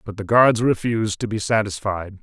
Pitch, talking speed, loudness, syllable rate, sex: 105 Hz, 190 wpm, -20 LUFS, 5.2 syllables/s, male